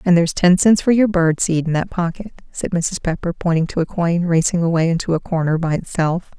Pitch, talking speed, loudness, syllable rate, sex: 170 Hz, 235 wpm, -18 LUFS, 5.7 syllables/s, female